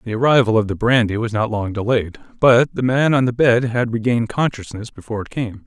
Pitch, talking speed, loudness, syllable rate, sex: 115 Hz, 210 wpm, -18 LUFS, 5.9 syllables/s, male